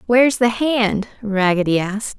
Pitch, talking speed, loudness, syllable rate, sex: 220 Hz, 135 wpm, -18 LUFS, 4.9 syllables/s, female